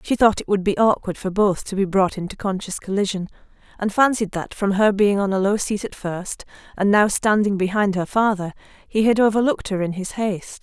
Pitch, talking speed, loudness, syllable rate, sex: 200 Hz, 220 wpm, -20 LUFS, 5.5 syllables/s, female